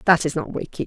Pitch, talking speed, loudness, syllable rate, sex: 150 Hz, 280 wpm, -23 LUFS, 6.4 syllables/s, female